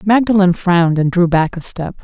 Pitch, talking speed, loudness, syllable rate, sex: 180 Hz, 205 wpm, -14 LUFS, 5.2 syllables/s, female